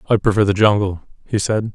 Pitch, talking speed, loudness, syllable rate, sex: 105 Hz, 205 wpm, -17 LUFS, 6.3 syllables/s, male